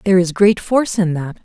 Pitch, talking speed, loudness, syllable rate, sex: 190 Hz, 250 wpm, -15 LUFS, 6.3 syllables/s, female